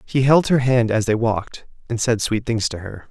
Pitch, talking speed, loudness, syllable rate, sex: 115 Hz, 250 wpm, -19 LUFS, 5.0 syllables/s, male